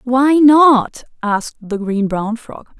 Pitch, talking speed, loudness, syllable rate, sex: 240 Hz, 150 wpm, -14 LUFS, 3.4 syllables/s, female